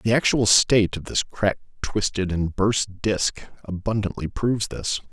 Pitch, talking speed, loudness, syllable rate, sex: 105 Hz, 150 wpm, -23 LUFS, 4.5 syllables/s, male